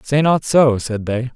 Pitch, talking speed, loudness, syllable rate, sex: 130 Hz, 220 wpm, -16 LUFS, 4.0 syllables/s, male